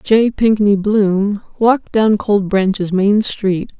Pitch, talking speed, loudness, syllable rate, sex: 205 Hz, 140 wpm, -15 LUFS, 3.2 syllables/s, female